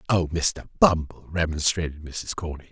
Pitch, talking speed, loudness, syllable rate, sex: 85 Hz, 135 wpm, -25 LUFS, 4.8 syllables/s, male